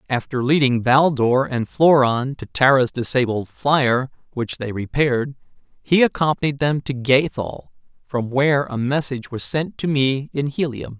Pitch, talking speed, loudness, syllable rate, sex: 135 Hz, 155 wpm, -19 LUFS, 4.5 syllables/s, male